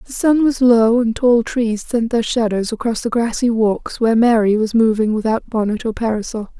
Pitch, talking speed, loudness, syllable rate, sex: 230 Hz, 200 wpm, -16 LUFS, 5.0 syllables/s, female